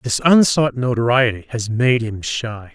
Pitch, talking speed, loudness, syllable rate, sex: 120 Hz, 155 wpm, -17 LUFS, 4.2 syllables/s, male